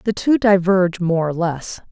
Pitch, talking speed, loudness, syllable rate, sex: 185 Hz, 190 wpm, -17 LUFS, 4.4 syllables/s, female